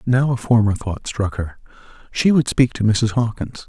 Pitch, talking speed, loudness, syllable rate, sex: 115 Hz, 180 wpm, -19 LUFS, 4.6 syllables/s, male